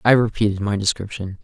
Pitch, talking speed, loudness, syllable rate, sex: 105 Hz, 165 wpm, -20 LUFS, 6.1 syllables/s, male